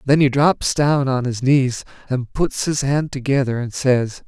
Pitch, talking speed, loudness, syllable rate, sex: 135 Hz, 195 wpm, -19 LUFS, 4.1 syllables/s, male